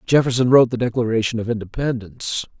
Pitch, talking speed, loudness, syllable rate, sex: 120 Hz, 140 wpm, -19 LUFS, 6.7 syllables/s, male